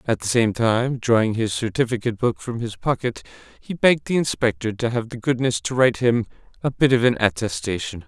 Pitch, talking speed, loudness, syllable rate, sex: 120 Hz, 200 wpm, -21 LUFS, 5.7 syllables/s, male